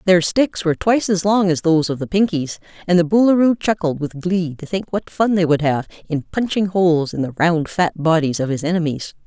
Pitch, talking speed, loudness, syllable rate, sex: 175 Hz, 225 wpm, -18 LUFS, 5.5 syllables/s, female